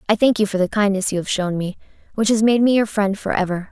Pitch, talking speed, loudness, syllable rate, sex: 205 Hz, 290 wpm, -19 LUFS, 6.4 syllables/s, female